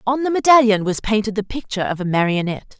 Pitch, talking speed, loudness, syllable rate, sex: 220 Hz, 215 wpm, -18 LUFS, 6.7 syllables/s, female